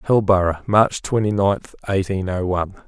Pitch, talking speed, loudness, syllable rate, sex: 95 Hz, 145 wpm, -19 LUFS, 4.9 syllables/s, male